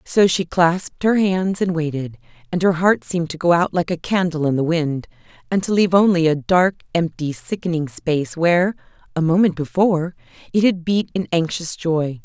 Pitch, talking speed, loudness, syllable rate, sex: 170 Hz, 190 wpm, -19 LUFS, 5.2 syllables/s, female